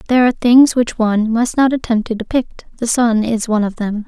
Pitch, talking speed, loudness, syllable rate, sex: 230 Hz, 235 wpm, -15 LUFS, 5.9 syllables/s, female